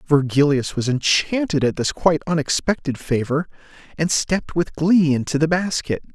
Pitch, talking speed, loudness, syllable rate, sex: 155 Hz, 145 wpm, -20 LUFS, 5.1 syllables/s, male